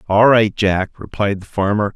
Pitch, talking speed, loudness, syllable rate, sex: 105 Hz, 185 wpm, -17 LUFS, 4.7 syllables/s, male